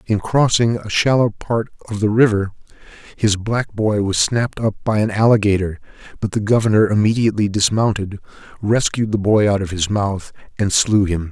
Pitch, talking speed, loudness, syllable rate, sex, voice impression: 105 Hz, 170 wpm, -17 LUFS, 5.3 syllables/s, male, very masculine, very middle-aged, very thick, tensed, very powerful, dark, soft, muffled, slightly fluent, cool, very intellectual, slightly refreshing, sincere, very calm, very mature, friendly, very reassuring, very unique, slightly elegant, very wild, sweet, slightly lively, kind, modest